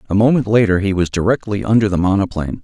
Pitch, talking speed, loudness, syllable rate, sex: 100 Hz, 205 wpm, -16 LUFS, 7.0 syllables/s, male